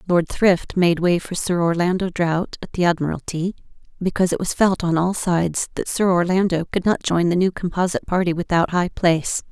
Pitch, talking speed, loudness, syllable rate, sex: 175 Hz, 195 wpm, -20 LUFS, 5.5 syllables/s, female